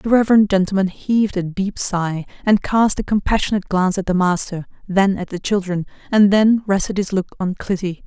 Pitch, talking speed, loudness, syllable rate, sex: 195 Hz, 195 wpm, -18 LUFS, 5.5 syllables/s, female